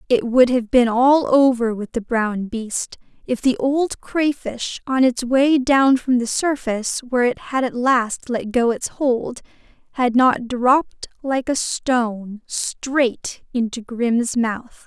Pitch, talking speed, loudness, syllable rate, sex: 250 Hz, 160 wpm, -19 LUFS, 3.6 syllables/s, female